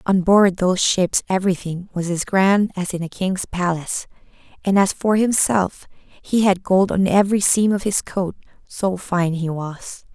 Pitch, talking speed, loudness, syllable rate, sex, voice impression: 185 Hz, 175 wpm, -19 LUFS, 4.4 syllables/s, female, feminine, slightly adult-like, fluent, sweet